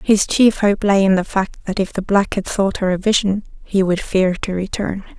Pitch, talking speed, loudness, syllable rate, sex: 195 Hz, 245 wpm, -18 LUFS, 4.7 syllables/s, female